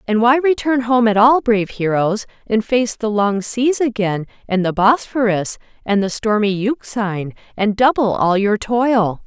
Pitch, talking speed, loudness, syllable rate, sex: 220 Hz, 170 wpm, -17 LUFS, 4.4 syllables/s, female